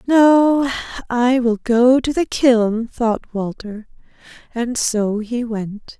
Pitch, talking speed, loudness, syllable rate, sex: 240 Hz, 130 wpm, -17 LUFS, 2.9 syllables/s, female